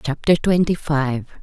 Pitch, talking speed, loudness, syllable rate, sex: 150 Hz, 125 wpm, -19 LUFS, 4.1 syllables/s, female